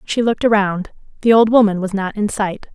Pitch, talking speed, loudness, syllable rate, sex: 205 Hz, 220 wpm, -16 LUFS, 5.7 syllables/s, female